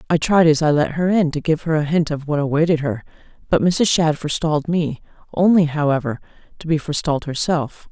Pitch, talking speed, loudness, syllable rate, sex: 155 Hz, 205 wpm, -18 LUFS, 6.0 syllables/s, female